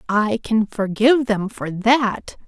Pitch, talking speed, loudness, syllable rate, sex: 220 Hz, 145 wpm, -19 LUFS, 3.7 syllables/s, female